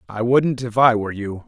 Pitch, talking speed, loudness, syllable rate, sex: 115 Hz, 285 wpm, -19 LUFS, 6.1 syllables/s, male